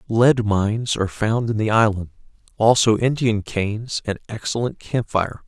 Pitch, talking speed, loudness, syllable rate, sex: 110 Hz, 145 wpm, -20 LUFS, 4.9 syllables/s, male